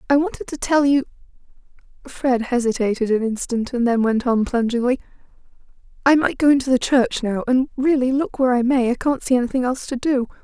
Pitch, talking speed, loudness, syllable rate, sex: 255 Hz, 195 wpm, -19 LUFS, 5.9 syllables/s, female